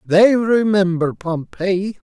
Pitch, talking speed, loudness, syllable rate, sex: 190 Hz, 85 wpm, -17 LUFS, 3.1 syllables/s, male